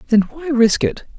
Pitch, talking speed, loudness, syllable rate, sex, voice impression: 255 Hz, 205 wpm, -17 LUFS, 4.7 syllables/s, female, feminine, adult-like, slightly calm